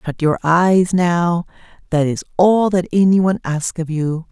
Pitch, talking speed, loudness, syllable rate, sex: 170 Hz, 180 wpm, -16 LUFS, 4.3 syllables/s, female